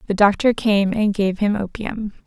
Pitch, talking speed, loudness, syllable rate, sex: 205 Hz, 185 wpm, -19 LUFS, 4.5 syllables/s, female